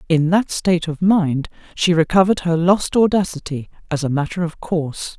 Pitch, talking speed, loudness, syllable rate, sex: 170 Hz, 175 wpm, -18 LUFS, 5.3 syllables/s, female